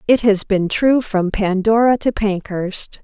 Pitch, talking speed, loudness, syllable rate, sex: 210 Hz, 160 wpm, -17 LUFS, 3.8 syllables/s, female